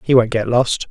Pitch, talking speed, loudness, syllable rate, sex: 120 Hz, 265 wpm, -16 LUFS, 4.9 syllables/s, male